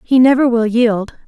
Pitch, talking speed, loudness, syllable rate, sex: 240 Hz, 190 wpm, -13 LUFS, 4.5 syllables/s, female